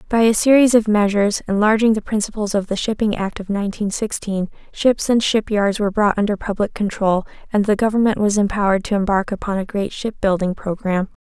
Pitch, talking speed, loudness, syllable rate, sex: 205 Hz, 190 wpm, -18 LUFS, 5.9 syllables/s, female